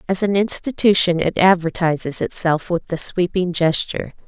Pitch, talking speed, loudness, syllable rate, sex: 180 Hz, 140 wpm, -18 LUFS, 5.0 syllables/s, female